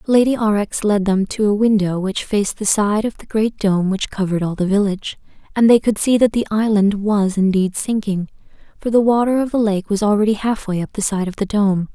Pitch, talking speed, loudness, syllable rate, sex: 205 Hz, 230 wpm, -17 LUFS, 5.5 syllables/s, female